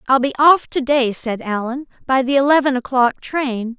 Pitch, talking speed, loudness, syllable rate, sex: 260 Hz, 190 wpm, -17 LUFS, 4.7 syllables/s, female